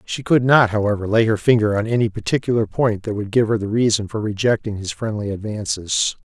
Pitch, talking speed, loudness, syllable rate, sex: 110 Hz, 210 wpm, -19 LUFS, 5.8 syllables/s, male